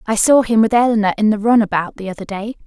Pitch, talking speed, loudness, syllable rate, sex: 220 Hz, 270 wpm, -15 LUFS, 6.6 syllables/s, female